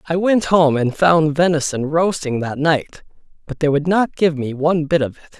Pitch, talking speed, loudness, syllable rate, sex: 155 Hz, 210 wpm, -17 LUFS, 4.9 syllables/s, male